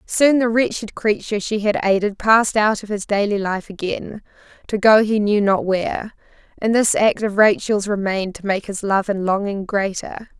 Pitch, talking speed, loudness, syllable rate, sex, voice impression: 205 Hz, 190 wpm, -19 LUFS, 4.9 syllables/s, female, feminine, slightly gender-neutral, slightly young, slightly adult-like, thin, tensed, slightly weak, bright, slightly hard, very clear, fluent, slightly raspy, cute, slightly intellectual, refreshing, sincere, slightly calm, very friendly, reassuring, slightly unique, wild, slightly sweet, lively, slightly kind, slightly intense